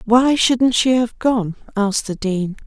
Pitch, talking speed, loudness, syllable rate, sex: 225 Hz, 180 wpm, -18 LUFS, 3.9 syllables/s, female